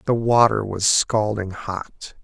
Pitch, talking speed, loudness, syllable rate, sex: 105 Hz, 135 wpm, -20 LUFS, 3.4 syllables/s, male